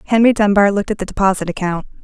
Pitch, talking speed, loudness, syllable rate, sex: 200 Hz, 205 wpm, -16 LUFS, 7.5 syllables/s, female